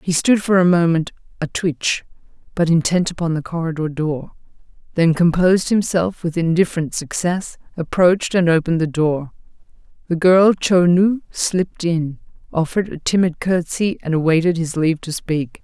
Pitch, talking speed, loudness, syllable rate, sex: 170 Hz, 155 wpm, -18 LUFS, 5.1 syllables/s, female